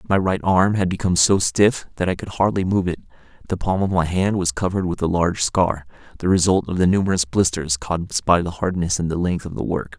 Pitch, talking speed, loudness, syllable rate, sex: 90 Hz, 240 wpm, -20 LUFS, 5.9 syllables/s, male